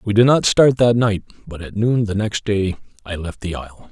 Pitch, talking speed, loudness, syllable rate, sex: 105 Hz, 245 wpm, -18 LUFS, 5.2 syllables/s, male